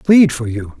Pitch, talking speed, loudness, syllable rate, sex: 140 Hz, 225 wpm, -14 LUFS, 4.4 syllables/s, male